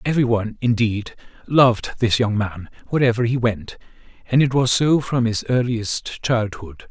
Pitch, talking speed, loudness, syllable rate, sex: 115 Hz, 155 wpm, -20 LUFS, 4.8 syllables/s, male